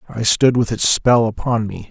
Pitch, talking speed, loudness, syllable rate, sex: 115 Hz, 220 wpm, -16 LUFS, 4.6 syllables/s, male